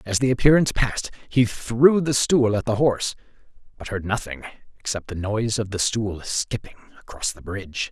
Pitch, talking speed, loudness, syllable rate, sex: 115 Hz, 180 wpm, -22 LUFS, 5.5 syllables/s, male